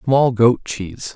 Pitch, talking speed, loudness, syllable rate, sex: 115 Hz, 155 wpm, -17 LUFS, 3.9 syllables/s, male